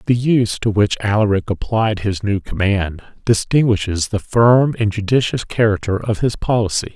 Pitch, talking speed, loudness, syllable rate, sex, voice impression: 110 Hz, 155 wpm, -17 LUFS, 4.8 syllables/s, male, masculine, slightly middle-aged, thick, tensed, powerful, slightly soft, raspy, cool, intellectual, slightly mature, friendly, wild, lively, kind